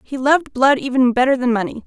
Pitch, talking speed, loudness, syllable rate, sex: 255 Hz, 225 wpm, -16 LUFS, 6.2 syllables/s, female